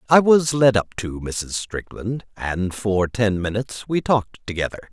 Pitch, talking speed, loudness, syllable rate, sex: 110 Hz, 170 wpm, -21 LUFS, 4.6 syllables/s, male